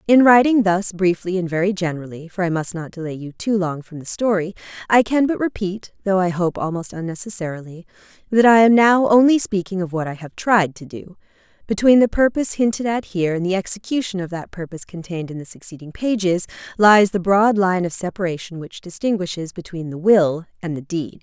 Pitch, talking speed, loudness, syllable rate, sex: 190 Hz, 195 wpm, -19 LUFS, 5.7 syllables/s, female